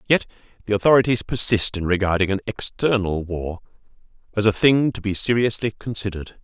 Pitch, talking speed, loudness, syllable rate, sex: 105 Hz, 150 wpm, -21 LUFS, 5.8 syllables/s, male